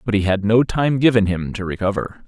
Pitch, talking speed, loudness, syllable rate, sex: 105 Hz, 240 wpm, -18 LUFS, 5.6 syllables/s, male